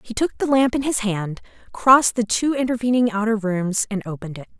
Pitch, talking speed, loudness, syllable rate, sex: 225 Hz, 210 wpm, -20 LUFS, 5.9 syllables/s, female